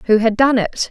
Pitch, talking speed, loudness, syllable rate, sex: 235 Hz, 265 wpm, -15 LUFS, 4.6 syllables/s, female